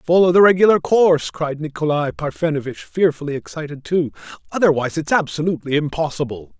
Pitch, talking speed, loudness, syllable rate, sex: 155 Hz, 125 wpm, -18 LUFS, 6.0 syllables/s, male